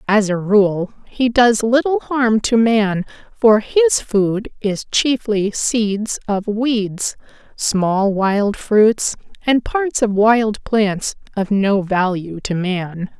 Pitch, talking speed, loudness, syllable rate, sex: 215 Hz, 135 wpm, -17 LUFS, 2.9 syllables/s, female